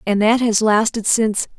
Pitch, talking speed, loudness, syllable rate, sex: 220 Hz, 190 wpm, -16 LUFS, 5.1 syllables/s, female